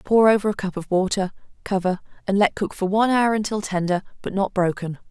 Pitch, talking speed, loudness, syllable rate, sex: 195 Hz, 210 wpm, -22 LUFS, 5.9 syllables/s, female